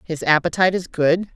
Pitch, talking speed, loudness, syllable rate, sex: 170 Hz, 180 wpm, -19 LUFS, 5.9 syllables/s, female